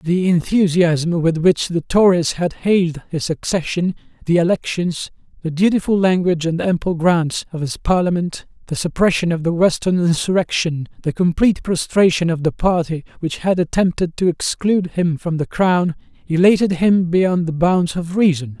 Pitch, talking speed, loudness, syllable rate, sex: 175 Hz, 160 wpm, -17 LUFS, 4.8 syllables/s, male